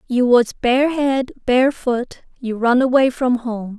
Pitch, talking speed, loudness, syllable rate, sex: 250 Hz, 145 wpm, -17 LUFS, 5.8 syllables/s, female